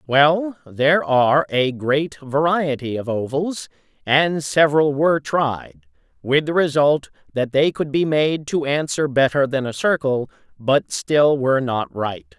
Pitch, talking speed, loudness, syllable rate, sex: 145 Hz, 150 wpm, -19 LUFS, 4.1 syllables/s, male